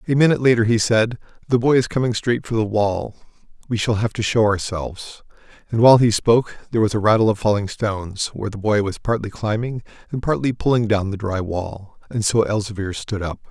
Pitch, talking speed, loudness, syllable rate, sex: 110 Hz, 215 wpm, -20 LUFS, 5.9 syllables/s, male